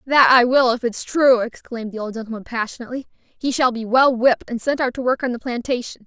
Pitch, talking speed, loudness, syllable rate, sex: 245 Hz, 245 wpm, -19 LUFS, 6.2 syllables/s, female